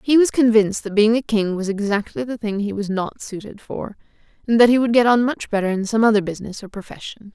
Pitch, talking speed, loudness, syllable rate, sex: 215 Hz, 245 wpm, -19 LUFS, 6.1 syllables/s, female